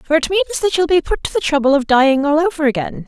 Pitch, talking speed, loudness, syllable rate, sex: 305 Hz, 290 wpm, -16 LUFS, 6.7 syllables/s, female